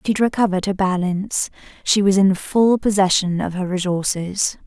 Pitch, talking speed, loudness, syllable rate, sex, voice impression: 190 Hz, 165 wpm, -19 LUFS, 5.3 syllables/s, female, feminine, adult-like, slightly soft, sincere, slightly calm, slightly friendly, slightly kind